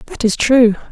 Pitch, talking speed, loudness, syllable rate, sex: 245 Hz, 200 wpm, -13 LUFS, 5.0 syllables/s, female